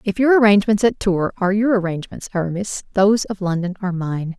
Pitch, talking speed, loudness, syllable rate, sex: 195 Hz, 190 wpm, -18 LUFS, 6.5 syllables/s, female